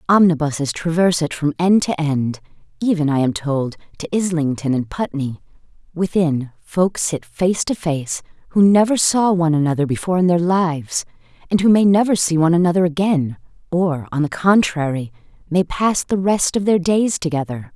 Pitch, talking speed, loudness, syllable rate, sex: 165 Hz, 165 wpm, -18 LUFS, 5.2 syllables/s, female